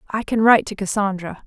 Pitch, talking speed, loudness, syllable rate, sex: 205 Hz, 205 wpm, -18 LUFS, 6.4 syllables/s, female